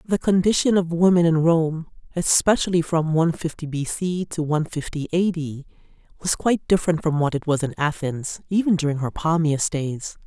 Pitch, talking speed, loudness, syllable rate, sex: 165 Hz, 180 wpm, -22 LUFS, 5.3 syllables/s, female